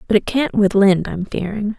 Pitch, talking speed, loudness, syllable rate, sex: 205 Hz, 235 wpm, -17 LUFS, 5.5 syllables/s, female